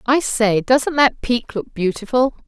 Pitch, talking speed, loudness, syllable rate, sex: 235 Hz, 170 wpm, -18 LUFS, 4.0 syllables/s, female